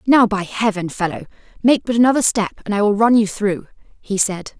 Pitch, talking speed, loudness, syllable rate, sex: 210 Hz, 210 wpm, -17 LUFS, 5.5 syllables/s, female